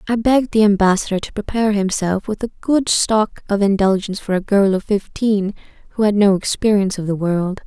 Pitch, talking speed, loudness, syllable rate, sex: 205 Hz, 195 wpm, -17 LUFS, 5.7 syllables/s, female